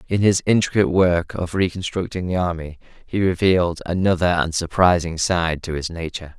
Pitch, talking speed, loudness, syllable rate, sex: 90 Hz, 160 wpm, -20 LUFS, 5.4 syllables/s, male